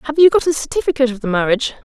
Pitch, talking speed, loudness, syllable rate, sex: 265 Hz, 250 wpm, -16 LUFS, 8.6 syllables/s, female